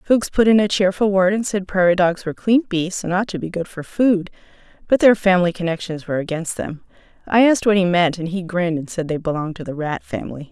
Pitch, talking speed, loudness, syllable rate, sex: 185 Hz, 245 wpm, -19 LUFS, 6.2 syllables/s, female